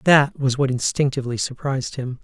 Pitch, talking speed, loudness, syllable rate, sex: 130 Hz, 160 wpm, -21 LUFS, 5.7 syllables/s, male